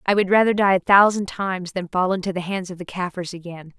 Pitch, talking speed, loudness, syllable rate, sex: 185 Hz, 255 wpm, -20 LUFS, 6.1 syllables/s, female